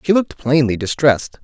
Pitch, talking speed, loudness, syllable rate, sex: 140 Hz, 170 wpm, -16 LUFS, 6.1 syllables/s, male